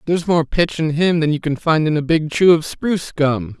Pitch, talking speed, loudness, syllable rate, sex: 160 Hz, 265 wpm, -17 LUFS, 5.3 syllables/s, male